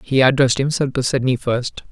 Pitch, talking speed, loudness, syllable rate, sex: 130 Hz, 190 wpm, -18 LUFS, 5.7 syllables/s, male